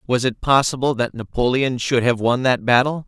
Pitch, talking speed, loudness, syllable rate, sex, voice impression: 125 Hz, 195 wpm, -19 LUFS, 5.1 syllables/s, male, very masculine, adult-like, thick, tensed, powerful, slightly bright, slightly soft, clear, fluent, slightly raspy, cool, intellectual, refreshing, sincere, slightly calm, very mature, friendly, slightly reassuring, unique, elegant, wild, very sweet, slightly lively, strict, slightly intense